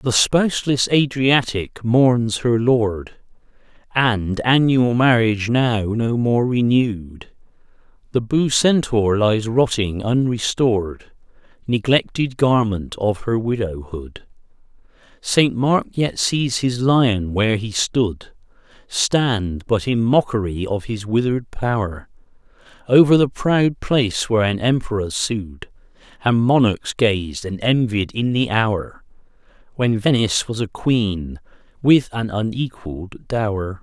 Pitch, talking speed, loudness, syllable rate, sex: 115 Hz, 115 wpm, -19 LUFS, 3.8 syllables/s, male